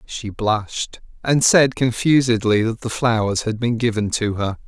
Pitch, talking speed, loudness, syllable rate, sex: 115 Hz, 165 wpm, -19 LUFS, 4.4 syllables/s, male